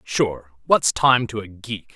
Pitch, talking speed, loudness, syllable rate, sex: 105 Hz, 185 wpm, -20 LUFS, 3.6 syllables/s, male